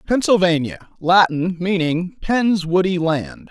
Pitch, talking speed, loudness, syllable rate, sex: 180 Hz, 85 wpm, -18 LUFS, 3.8 syllables/s, male